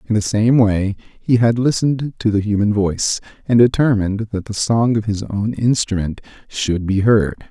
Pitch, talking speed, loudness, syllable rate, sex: 110 Hz, 185 wpm, -17 LUFS, 4.8 syllables/s, male